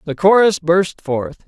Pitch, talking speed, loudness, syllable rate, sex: 175 Hz, 165 wpm, -15 LUFS, 3.8 syllables/s, male